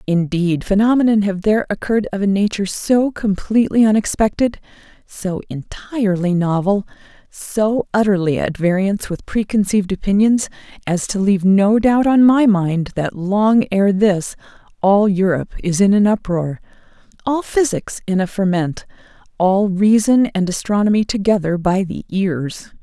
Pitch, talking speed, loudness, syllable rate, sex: 200 Hz, 130 wpm, -17 LUFS, 4.8 syllables/s, female